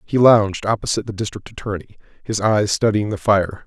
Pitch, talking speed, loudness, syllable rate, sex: 105 Hz, 180 wpm, -19 LUFS, 6.1 syllables/s, male